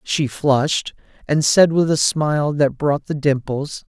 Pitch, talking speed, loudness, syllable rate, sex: 145 Hz, 165 wpm, -18 LUFS, 4.1 syllables/s, male